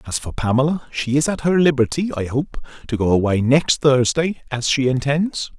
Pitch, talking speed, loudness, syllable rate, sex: 135 Hz, 195 wpm, -19 LUFS, 5.1 syllables/s, male